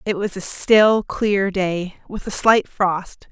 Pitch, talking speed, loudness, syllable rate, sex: 195 Hz, 180 wpm, -18 LUFS, 3.3 syllables/s, female